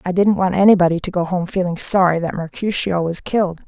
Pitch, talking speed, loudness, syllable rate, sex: 180 Hz, 210 wpm, -17 LUFS, 6.0 syllables/s, female